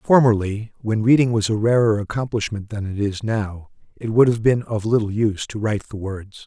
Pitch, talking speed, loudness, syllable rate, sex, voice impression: 110 Hz, 205 wpm, -20 LUFS, 5.6 syllables/s, male, masculine, middle-aged, slightly relaxed, powerful, slightly hard, raspy, slightly calm, mature, wild, lively, slightly strict